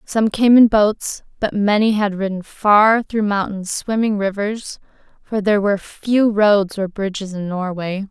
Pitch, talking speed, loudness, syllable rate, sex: 205 Hz, 165 wpm, -17 LUFS, 4.2 syllables/s, female